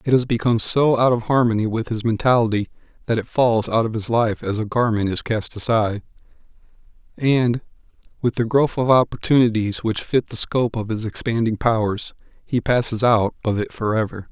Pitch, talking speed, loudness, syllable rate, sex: 115 Hz, 180 wpm, -20 LUFS, 5.4 syllables/s, male